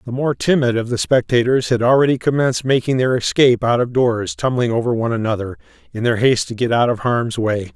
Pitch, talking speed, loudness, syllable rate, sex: 120 Hz, 215 wpm, -17 LUFS, 6.1 syllables/s, male